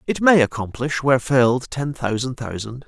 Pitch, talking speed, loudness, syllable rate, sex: 130 Hz, 165 wpm, -20 LUFS, 5.2 syllables/s, male